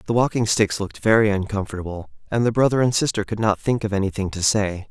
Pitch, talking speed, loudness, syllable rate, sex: 105 Hz, 220 wpm, -21 LUFS, 6.4 syllables/s, male